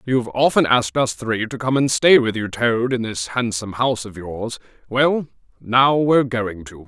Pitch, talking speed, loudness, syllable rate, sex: 120 Hz, 200 wpm, -19 LUFS, 5.0 syllables/s, male